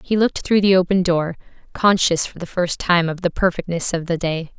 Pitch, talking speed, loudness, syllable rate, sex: 175 Hz, 225 wpm, -19 LUFS, 5.3 syllables/s, female